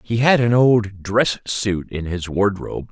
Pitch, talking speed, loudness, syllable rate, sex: 105 Hz, 185 wpm, -19 LUFS, 4.0 syllables/s, male